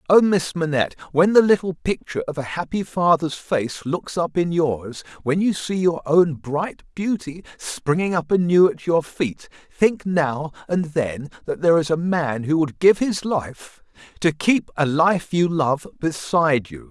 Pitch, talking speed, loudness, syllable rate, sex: 160 Hz, 180 wpm, -21 LUFS, 4.3 syllables/s, male